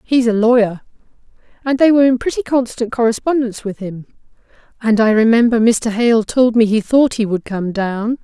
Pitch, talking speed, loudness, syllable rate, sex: 230 Hz, 180 wpm, -15 LUFS, 5.3 syllables/s, female